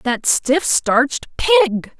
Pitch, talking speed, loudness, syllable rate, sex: 285 Hz, 120 wpm, -16 LUFS, 3.5 syllables/s, female